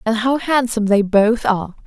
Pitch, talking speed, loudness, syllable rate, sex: 225 Hz, 195 wpm, -17 LUFS, 5.4 syllables/s, female